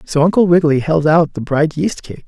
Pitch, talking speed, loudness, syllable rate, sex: 155 Hz, 240 wpm, -14 LUFS, 5.5 syllables/s, male